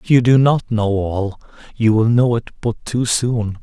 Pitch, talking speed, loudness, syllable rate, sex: 115 Hz, 215 wpm, -17 LUFS, 4.4 syllables/s, male